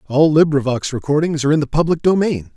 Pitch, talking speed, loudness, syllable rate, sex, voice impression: 145 Hz, 190 wpm, -16 LUFS, 6.3 syllables/s, male, masculine, adult-like, tensed, powerful, bright, clear, slightly raspy, cool, intellectual, mature, slightly friendly, wild, lively, slightly strict